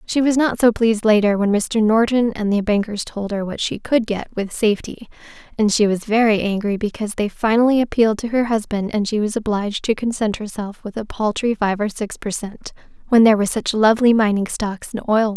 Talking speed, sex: 245 wpm, female